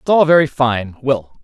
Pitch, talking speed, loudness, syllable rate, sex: 140 Hz, 165 wpm, -15 LUFS, 4.5 syllables/s, male